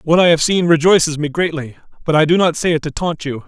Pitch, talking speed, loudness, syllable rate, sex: 160 Hz, 275 wpm, -15 LUFS, 6.2 syllables/s, male